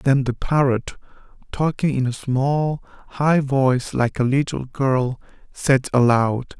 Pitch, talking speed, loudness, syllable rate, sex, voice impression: 135 Hz, 135 wpm, -20 LUFS, 3.9 syllables/s, male, very masculine, very adult-like, middle-aged, thick, slightly tensed, powerful, bright, soft, slightly muffled, fluent, slightly raspy, cool, intellectual, very sincere, very calm, mature, slightly friendly, reassuring, unique, slightly elegant, wild, slightly sweet, lively, kind, modest